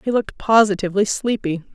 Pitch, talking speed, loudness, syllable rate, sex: 205 Hz, 135 wpm, -19 LUFS, 6.1 syllables/s, female